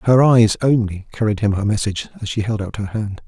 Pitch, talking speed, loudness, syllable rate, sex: 110 Hz, 240 wpm, -18 LUFS, 5.9 syllables/s, male